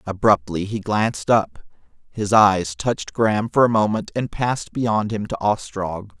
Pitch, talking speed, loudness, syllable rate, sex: 105 Hz, 165 wpm, -20 LUFS, 4.6 syllables/s, male